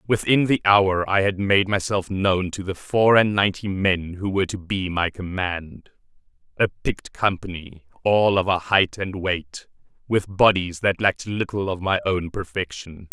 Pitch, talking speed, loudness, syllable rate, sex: 95 Hz, 175 wpm, -21 LUFS, 4.5 syllables/s, male